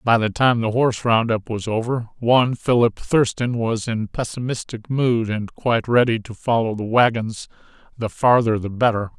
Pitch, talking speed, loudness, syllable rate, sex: 115 Hz, 170 wpm, -20 LUFS, 4.9 syllables/s, male